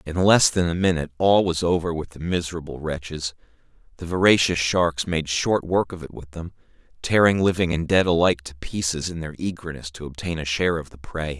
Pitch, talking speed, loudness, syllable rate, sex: 85 Hz, 205 wpm, -22 LUFS, 5.7 syllables/s, male